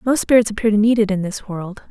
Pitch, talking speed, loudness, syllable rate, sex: 210 Hz, 285 wpm, -17 LUFS, 6.3 syllables/s, female